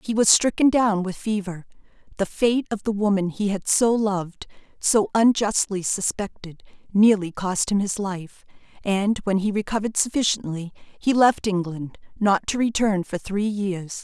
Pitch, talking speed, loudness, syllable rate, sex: 200 Hz, 160 wpm, -22 LUFS, 4.5 syllables/s, female